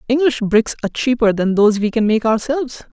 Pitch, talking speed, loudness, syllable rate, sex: 235 Hz, 200 wpm, -16 LUFS, 6.1 syllables/s, female